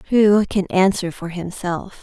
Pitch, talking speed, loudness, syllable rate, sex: 185 Hz, 150 wpm, -19 LUFS, 4.0 syllables/s, female